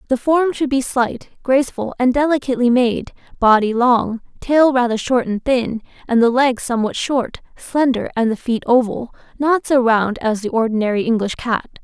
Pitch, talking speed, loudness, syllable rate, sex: 245 Hz, 170 wpm, -17 LUFS, 4.9 syllables/s, female